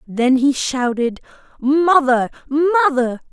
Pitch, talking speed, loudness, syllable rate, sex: 275 Hz, 90 wpm, -17 LUFS, 4.1 syllables/s, female